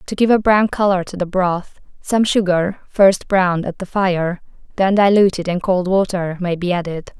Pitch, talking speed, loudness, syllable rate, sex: 185 Hz, 190 wpm, -17 LUFS, 4.7 syllables/s, female